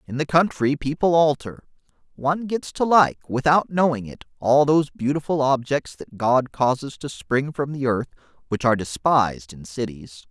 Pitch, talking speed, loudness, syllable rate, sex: 135 Hz, 170 wpm, -21 LUFS, 4.9 syllables/s, male